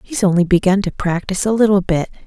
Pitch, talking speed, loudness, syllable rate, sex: 190 Hz, 210 wpm, -16 LUFS, 6.4 syllables/s, female